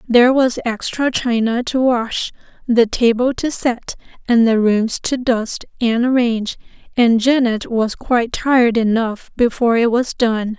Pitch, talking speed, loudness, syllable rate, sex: 235 Hz, 155 wpm, -17 LUFS, 4.3 syllables/s, female